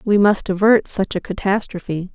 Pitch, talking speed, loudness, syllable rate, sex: 195 Hz, 170 wpm, -18 LUFS, 4.9 syllables/s, female